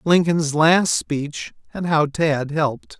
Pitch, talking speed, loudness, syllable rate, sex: 155 Hz, 140 wpm, -19 LUFS, 3.4 syllables/s, male